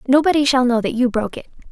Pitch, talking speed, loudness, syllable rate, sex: 255 Hz, 245 wpm, -17 LUFS, 7.4 syllables/s, female